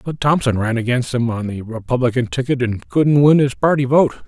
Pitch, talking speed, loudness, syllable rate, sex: 125 Hz, 210 wpm, -17 LUFS, 5.4 syllables/s, male